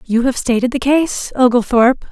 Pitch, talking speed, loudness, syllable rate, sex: 245 Hz, 170 wpm, -15 LUFS, 5.1 syllables/s, female